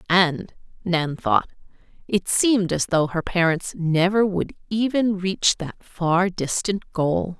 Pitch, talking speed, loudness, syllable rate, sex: 180 Hz, 140 wpm, -22 LUFS, 3.6 syllables/s, female